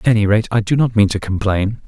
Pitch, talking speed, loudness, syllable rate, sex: 105 Hz, 290 wpm, -16 LUFS, 6.2 syllables/s, male